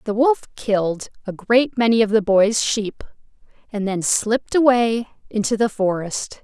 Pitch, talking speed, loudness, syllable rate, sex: 220 Hz, 160 wpm, -19 LUFS, 4.4 syllables/s, female